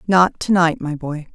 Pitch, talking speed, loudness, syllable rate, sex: 165 Hz, 180 wpm, -18 LUFS, 4.3 syllables/s, female